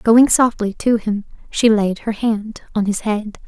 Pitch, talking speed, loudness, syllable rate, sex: 215 Hz, 190 wpm, -18 LUFS, 4.0 syllables/s, female